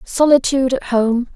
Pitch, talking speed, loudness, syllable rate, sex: 255 Hz, 130 wpm, -16 LUFS, 4.9 syllables/s, female